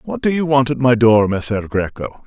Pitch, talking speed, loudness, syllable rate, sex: 125 Hz, 240 wpm, -16 LUFS, 5.1 syllables/s, male